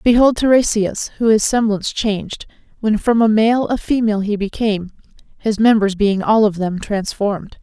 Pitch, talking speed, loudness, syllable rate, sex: 215 Hz, 165 wpm, -16 LUFS, 5.1 syllables/s, female